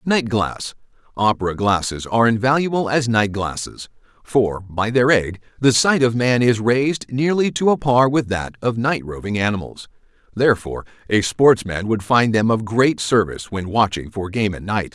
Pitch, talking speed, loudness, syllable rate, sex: 115 Hz, 175 wpm, -19 LUFS, 4.9 syllables/s, male